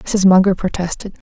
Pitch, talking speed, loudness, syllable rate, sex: 190 Hz, 140 wpm, -15 LUFS, 5.2 syllables/s, female